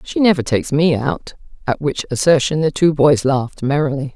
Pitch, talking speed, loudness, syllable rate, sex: 150 Hz, 190 wpm, -16 LUFS, 5.4 syllables/s, female